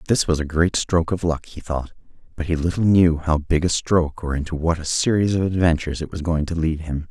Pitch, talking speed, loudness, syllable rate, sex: 85 Hz, 255 wpm, -21 LUFS, 5.9 syllables/s, male